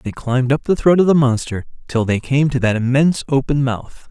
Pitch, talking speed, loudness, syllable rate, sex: 130 Hz, 235 wpm, -17 LUFS, 5.5 syllables/s, male